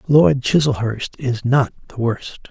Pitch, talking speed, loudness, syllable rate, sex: 125 Hz, 145 wpm, -19 LUFS, 3.7 syllables/s, male